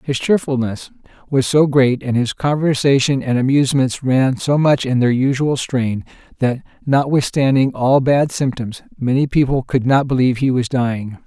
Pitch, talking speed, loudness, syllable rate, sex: 130 Hz, 160 wpm, -17 LUFS, 4.7 syllables/s, male